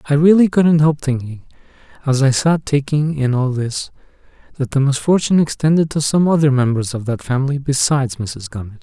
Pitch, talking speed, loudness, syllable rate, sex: 140 Hz, 175 wpm, -16 LUFS, 5.7 syllables/s, male